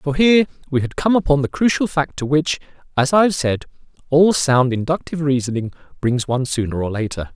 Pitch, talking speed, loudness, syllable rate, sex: 145 Hz, 195 wpm, -18 LUFS, 5.9 syllables/s, male